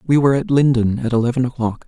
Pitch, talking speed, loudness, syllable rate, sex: 130 Hz, 225 wpm, -17 LUFS, 6.8 syllables/s, male